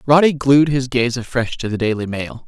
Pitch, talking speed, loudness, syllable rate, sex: 130 Hz, 220 wpm, -17 LUFS, 5.1 syllables/s, male